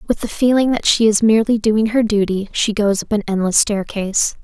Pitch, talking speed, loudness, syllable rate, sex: 215 Hz, 215 wpm, -16 LUFS, 5.5 syllables/s, female